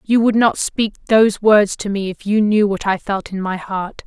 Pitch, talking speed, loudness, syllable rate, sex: 205 Hz, 250 wpm, -17 LUFS, 4.7 syllables/s, female